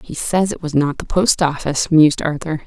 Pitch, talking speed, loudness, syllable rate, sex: 155 Hz, 225 wpm, -17 LUFS, 5.5 syllables/s, female